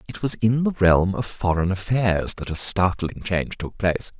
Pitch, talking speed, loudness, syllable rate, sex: 100 Hz, 200 wpm, -21 LUFS, 4.8 syllables/s, male